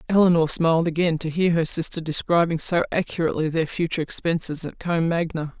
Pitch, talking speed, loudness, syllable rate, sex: 165 Hz, 170 wpm, -22 LUFS, 6.2 syllables/s, female